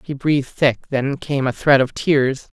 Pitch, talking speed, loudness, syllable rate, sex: 140 Hz, 210 wpm, -18 LUFS, 4.2 syllables/s, female